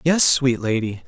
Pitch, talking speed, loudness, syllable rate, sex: 130 Hz, 165 wpm, -18 LUFS, 4.2 syllables/s, male